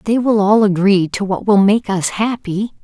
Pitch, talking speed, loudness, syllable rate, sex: 205 Hz, 210 wpm, -15 LUFS, 4.6 syllables/s, female